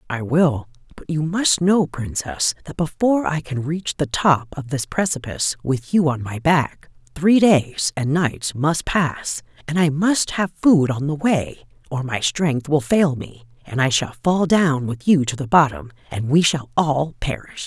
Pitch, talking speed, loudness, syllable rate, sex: 145 Hz, 195 wpm, -20 LUFS, 4.2 syllables/s, female